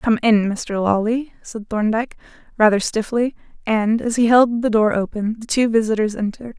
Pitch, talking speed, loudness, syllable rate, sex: 220 Hz, 175 wpm, -19 LUFS, 5.1 syllables/s, female